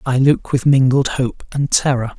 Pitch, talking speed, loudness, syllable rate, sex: 130 Hz, 190 wpm, -16 LUFS, 4.5 syllables/s, male